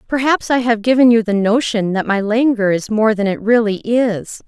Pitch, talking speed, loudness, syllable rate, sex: 220 Hz, 215 wpm, -15 LUFS, 4.9 syllables/s, female